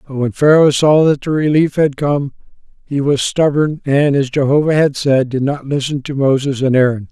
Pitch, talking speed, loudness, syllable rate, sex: 140 Hz, 195 wpm, -14 LUFS, 4.8 syllables/s, male